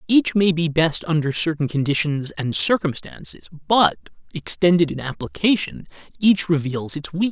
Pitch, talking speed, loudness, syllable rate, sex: 160 Hz, 140 wpm, -20 LUFS, 5.1 syllables/s, male